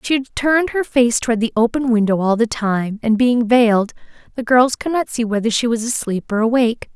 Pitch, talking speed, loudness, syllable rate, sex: 235 Hz, 225 wpm, -17 LUFS, 5.5 syllables/s, female